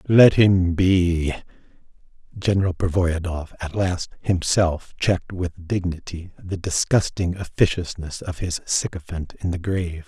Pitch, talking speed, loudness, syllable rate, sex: 90 Hz, 120 wpm, -22 LUFS, 4.3 syllables/s, male